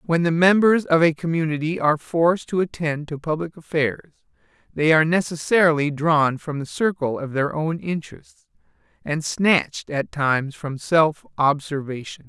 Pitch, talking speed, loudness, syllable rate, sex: 160 Hz, 150 wpm, -21 LUFS, 4.8 syllables/s, male